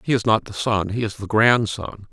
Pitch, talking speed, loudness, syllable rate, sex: 110 Hz, 255 wpm, -20 LUFS, 5.0 syllables/s, male